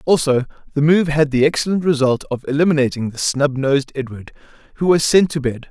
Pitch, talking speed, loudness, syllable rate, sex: 145 Hz, 190 wpm, -17 LUFS, 6.0 syllables/s, male